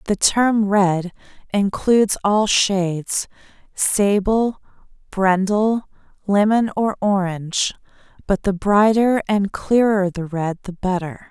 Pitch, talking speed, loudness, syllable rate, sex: 200 Hz, 105 wpm, -19 LUFS, 3.6 syllables/s, female